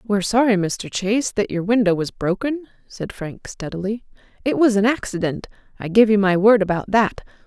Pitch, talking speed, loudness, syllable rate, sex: 205 Hz, 185 wpm, -19 LUFS, 5.4 syllables/s, female